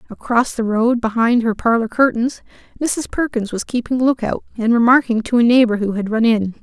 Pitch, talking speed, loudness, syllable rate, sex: 235 Hz, 190 wpm, -17 LUFS, 5.3 syllables/s, female